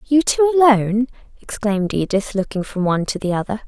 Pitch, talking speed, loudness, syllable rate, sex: 220 Hz, 180 wpm, -18 LUFS, 6.2 syllables/s, female